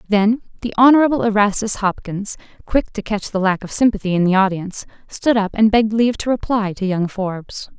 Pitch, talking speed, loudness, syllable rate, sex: 210 Hz, 195 wpm, -18 LUFS, 5.7 syllables/s, female